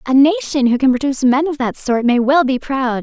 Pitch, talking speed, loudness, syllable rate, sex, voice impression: 270 Hz, 260 wpm, -15 LUFS, 5.4 syllables/s, female, feminine, adult-like, tensed, slightly powerful, bright, soft, clear, slightly cute, calm, friendly, reassuring, elegant, slightly sweet, kind, slightly modest